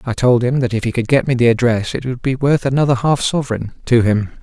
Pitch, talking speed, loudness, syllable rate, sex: 125 Hz, 270 wpm, -16 LUFS, 6.1 syllables/s, male